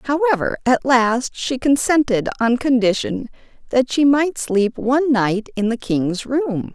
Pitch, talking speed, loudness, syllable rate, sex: 250 Hz, 150 wpm, -18 LUFS, 4.0 syllables/s, female